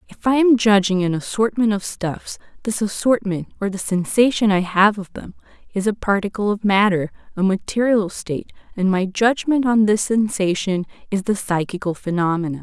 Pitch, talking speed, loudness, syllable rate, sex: 200 Hz, 165 wpm, -19 LUFS, 5.1 syllables/s, female